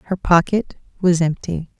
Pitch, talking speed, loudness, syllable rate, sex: 175 Hz, 135 wpm, -18 LUFS, 4.8 syllables/s, female